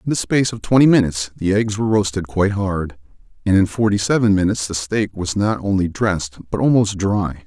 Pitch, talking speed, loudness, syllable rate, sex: 100 Hz, 210 wpm, -18 LUFS, 6.0 syllables/s, male